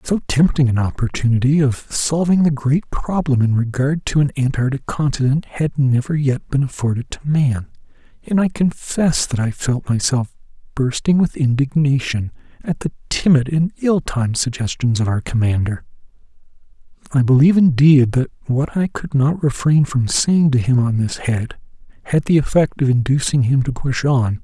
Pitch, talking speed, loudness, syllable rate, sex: 135 Hz, 165 wpm, -17 LUFS, 4.8 syllables/s, male